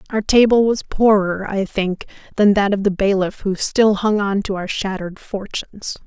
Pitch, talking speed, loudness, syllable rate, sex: 200 Hz, 190 wpm, -18 LUFS, 4.8 syllables/s, female